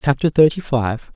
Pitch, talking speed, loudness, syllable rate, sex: 135 Hz, 155 wpm, -17 LUFS, 4.8 syllables/s, male